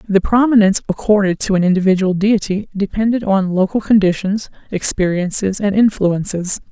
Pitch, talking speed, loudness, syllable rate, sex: 200 Hz, 125 wpm, -15 LUFS, 5.4 syllables/s, female